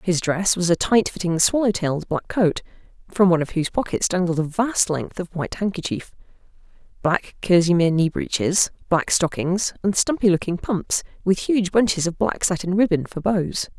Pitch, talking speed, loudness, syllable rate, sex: 180 Hz, 180 wpm, -21 LUFS, 3.9 syllables/s, female